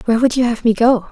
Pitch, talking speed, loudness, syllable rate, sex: 230 Hz, 325 wpm, -15 LUFS, 7.3 syllables/s, female